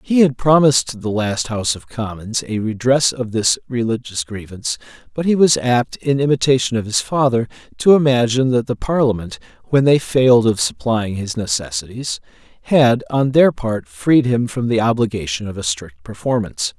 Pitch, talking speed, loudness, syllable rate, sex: 120 Hz, 175 wpm, -17 LUFS, 5.2 syllables/s, male